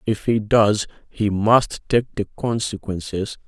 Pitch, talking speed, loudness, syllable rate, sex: 105 Hz, 140 wpm, -21 LUFS, 3.9 syllables/s, male